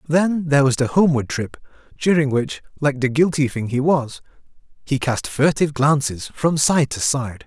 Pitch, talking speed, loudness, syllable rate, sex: 140 Hz, 175 wpm, -19 LUFS, 4.9 syllables/s, male